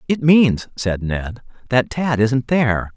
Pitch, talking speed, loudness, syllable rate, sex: 125 Hz, 160 wpm, -18 LUFS, 3.7 syllables/s, male